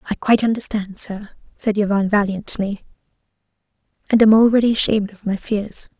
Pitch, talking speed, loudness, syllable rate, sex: 210 Hz, 140 wpm, -18 LUFS, 5.9 syllables/s, female